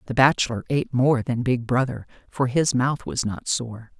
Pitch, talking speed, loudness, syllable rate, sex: 125 Hz, 195 wpm, -23 LUFS, 4.8 syllables/s, female